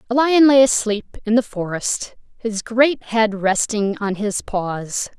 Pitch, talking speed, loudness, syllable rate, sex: 220 Hz, 160 wpm, -18 LUFS, 3.6 syllables/s, female